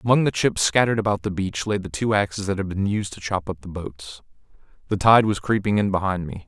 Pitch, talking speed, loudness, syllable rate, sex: 100 Hz, 250 wpm, -22 LUFS, 6.0 syllables/s, male